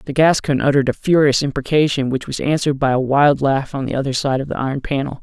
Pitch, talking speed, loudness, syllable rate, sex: 140 Hz, 240 wpm, -17 LUFS, 6.5 syllables/s, male